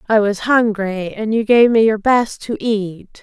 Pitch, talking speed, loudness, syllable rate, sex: 215 Hz, 205 wpm, -16 LUFS, 4.0 syllables/s, female